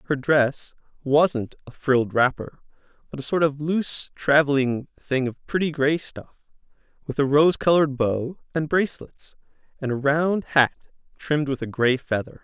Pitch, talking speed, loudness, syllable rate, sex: 140 Hz, 160 wpm, -22 LUFS, 4.6 syllables/s, male